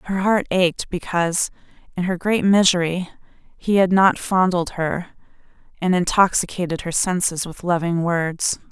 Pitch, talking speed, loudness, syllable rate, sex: 180 Hz, 140 wpm, -20 LUFS, 4.4 syllables/s, female